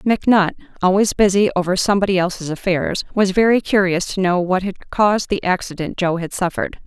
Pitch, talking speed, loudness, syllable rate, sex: 190 Hz, 175 wpm, -18 LUFS, 5.8 syllables/s, female